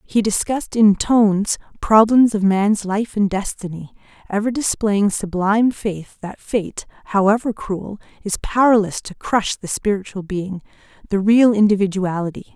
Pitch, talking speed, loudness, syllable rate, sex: 205 Hz, 135 wpm, -18 LUFS, 4.6 syllables/s, female